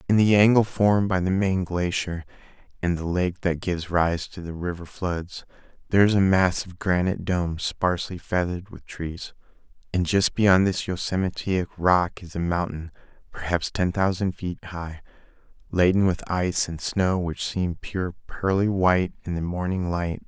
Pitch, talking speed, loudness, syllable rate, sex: 90 Hz, 165 wpm, -24 LUFS, 4.8 syllables/s, male